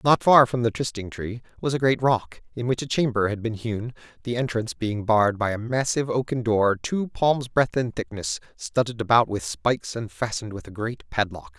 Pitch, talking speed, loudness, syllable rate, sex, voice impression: 115 Hz, 205 wpm, -24 LUFS, 5.3 syllables/s, male, very masculine, very middle-aged, thick, very tensed, very powerful, very bright, soft, very clear, very fluent, slightly raspy, very cool, intellectual, very refreshing, sincere, slightly calm, mature, friendly, reassuring, very unique, slightly elegant, very wild, slightly sweet, very lively, kind, intense